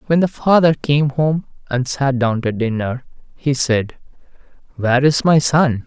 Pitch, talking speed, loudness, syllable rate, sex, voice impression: 135 Hz, 165 wpm, -17 LUFS, 4.3 syllables/s, male, slightly masculine, adult-like, slightly halting, calm, slightly unique